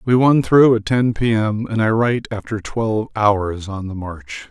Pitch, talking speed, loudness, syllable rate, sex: 110 Hz, 215 wpm, -18 LUFS, 4.5 syllables/s, male